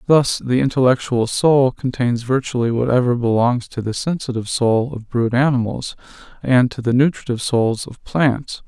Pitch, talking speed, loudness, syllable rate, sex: 125 Hz, 150 wpm, -18 LUFS, 5.0 syllables/s, male